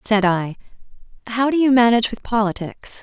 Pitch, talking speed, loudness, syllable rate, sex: 225 Hz, 160 wpm, -18 LUFS, 5.5 syllables/s, female